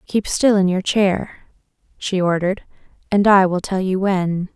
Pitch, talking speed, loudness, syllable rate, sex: 190 Hz, 170 wpm, -18 LUFS, 4.3 syllables/s, female